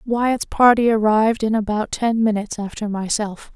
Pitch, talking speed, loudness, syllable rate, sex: 220 Hz, 150 wpm, -19 LUFS, 5.0 syllables/s, female